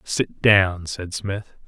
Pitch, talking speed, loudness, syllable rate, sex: 95 Hz, 145 wpm, -21 LUFS, 2.7 syllables/s, male